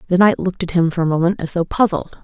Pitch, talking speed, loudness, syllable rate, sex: 175 Hz, 295 wpm, -17 LUFS, 6.9 syllables/s, female